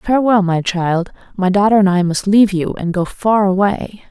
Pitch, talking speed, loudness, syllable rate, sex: 195 Hz, 205 wpm, -15 LUFS, 5.0 syllables/s, female